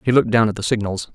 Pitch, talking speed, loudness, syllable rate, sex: 110 Hz, 315 wpm, -19 LUFS, 7.7 syllables/s, male